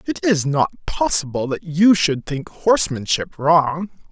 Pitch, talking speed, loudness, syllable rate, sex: 165 Hz, 145 wpm, -19 LUFS, 4.1 syllables/s, male